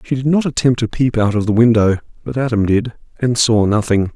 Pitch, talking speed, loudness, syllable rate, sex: 115 Hz, 215 wpm, -16 LUFS, 5.6 syllables/s, male